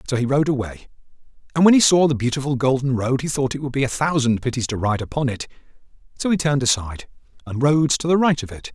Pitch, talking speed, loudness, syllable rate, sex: 135 Hz, 240 wpm, -20 LUFS, 6.6 syllables/s, male